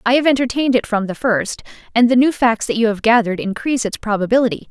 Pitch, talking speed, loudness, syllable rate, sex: 235 Hz, 230 wpm, -17 LUFS, 6.8 syllables/s, female